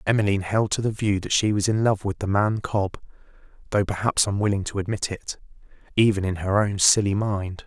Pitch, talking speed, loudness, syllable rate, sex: 100 Hz, 205 wpm, -23 LUFS, 5.6 syllables/s, male